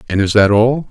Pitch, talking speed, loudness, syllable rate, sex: 110 Hz, 265 wpm, -12 LUFS, 5.5 syllables/s, male